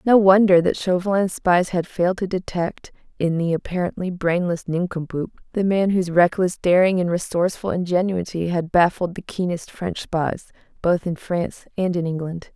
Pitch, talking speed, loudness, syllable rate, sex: 180 Hz, 160 wpm, -21 LUFS, 5.1 syllables/s, female